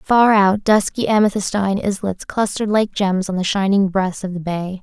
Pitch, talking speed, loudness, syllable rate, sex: 200 Hz, 185 wpm, -18 LUFS, 5.1 syllables/s, female